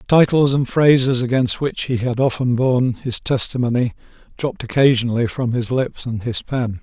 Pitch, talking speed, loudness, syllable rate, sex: 125 Hz, 165 wpm, -18 LUFS, 5.1 syllables/s, male